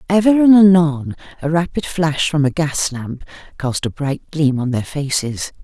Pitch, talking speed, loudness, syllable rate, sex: 155 Hz, 180 wpm, -16 LUFS, 4.4 syllables/s, female